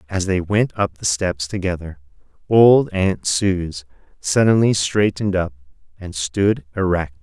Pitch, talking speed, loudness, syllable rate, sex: 90 Hz, 135 wpm, -19 LUFS, 4.1 syllables/s, male